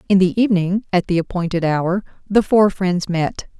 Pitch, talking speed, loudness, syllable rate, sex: 185 Hz, 185 wpm, -18 LUFS, 4.9 syllables/s, female